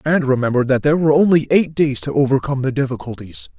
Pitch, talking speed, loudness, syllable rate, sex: 135 Hz, 200 wpm, -17 LUFS, 6.7 syllables/s, male